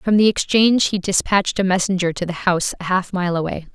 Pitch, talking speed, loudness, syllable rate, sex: 185 Hz, 225 wpm, -18 LUFS, 6.1 syllables/s, female